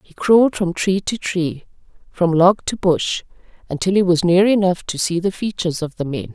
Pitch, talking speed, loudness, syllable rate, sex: 180 Hz, 210 wpm, -18 LUFS, 5.0 syllables/s, female